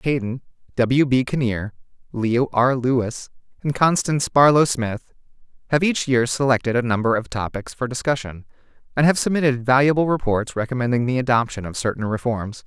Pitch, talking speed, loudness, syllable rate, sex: 125 Hz, 150 wpm, -20 LUFS, 5.4 syllables/s, male